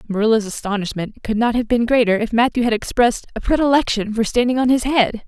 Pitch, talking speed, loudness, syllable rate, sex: 230 Hz, 205 wpm, -18 LUFS, 6.2 syllables/s, female